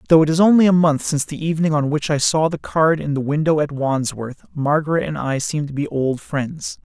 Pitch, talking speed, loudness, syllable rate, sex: 150 Hz, 240 wpm, -19 LUFS, 5.5 syllables/s, male